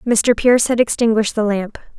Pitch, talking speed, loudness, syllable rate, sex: 225 Hz, 180 wpm, -16 LUFS, 5.8 syllables/s, female